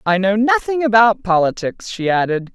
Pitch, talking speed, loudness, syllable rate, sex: 200 Hz, 165 wpm, -16 LUFS, 4.9 syllables/s, female